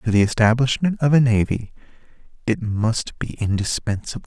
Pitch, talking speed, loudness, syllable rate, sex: 115 Hz, 140 wpm, -20 LUFS, 5.1 syllables/s, male